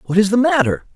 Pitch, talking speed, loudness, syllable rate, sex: 195 Hz, 250 wpm, -16 LUFS, 6.0 syllables/s, male